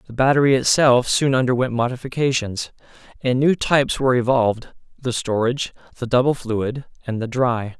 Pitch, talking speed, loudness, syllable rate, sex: 125 Hz, 140 wpm, -19 LUFS, 5.4 syllables/s, male